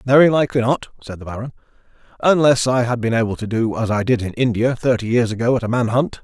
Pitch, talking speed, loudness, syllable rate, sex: 120 Hz, 240 wpm, -18 LUFS, 6.5 syllables/s, male